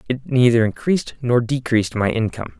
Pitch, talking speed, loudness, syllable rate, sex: 120 Hz, 160 wpm, -19 LUFS, 6.0 syllables/s, male